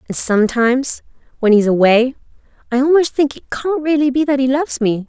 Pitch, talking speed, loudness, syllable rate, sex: 260 Hz, 200 wpm, -15 LUFS, 6.0 syllables/s, female